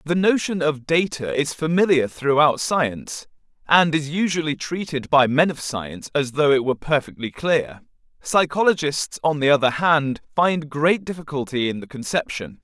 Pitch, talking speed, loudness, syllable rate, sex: 150 Hz, 155 wpm, -21 LUFS, 4.8 syllables/s, male